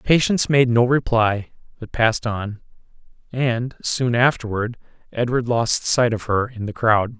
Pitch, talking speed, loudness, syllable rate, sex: 115 Hz, 150 wpm, -20 LUFS, 4.4 syllables/s, male